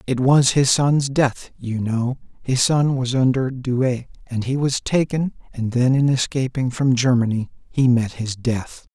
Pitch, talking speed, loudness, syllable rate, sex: 130 Hz, 175 wpm, -20 LUFS, 4.0 syllables/s, male